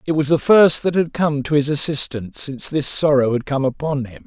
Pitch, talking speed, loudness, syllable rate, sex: 145 Hz, 240 wpm, -18 LUFS, 5.6 syllables/s, male